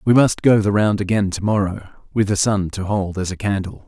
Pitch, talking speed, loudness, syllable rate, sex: 100 Hz, 235 wpm, -19 LUFS, 5.1 syllables/s, male